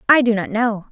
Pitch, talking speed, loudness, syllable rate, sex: 230 Hz, 260 wpm, -17 LUFS, 5.6 syllables/s, female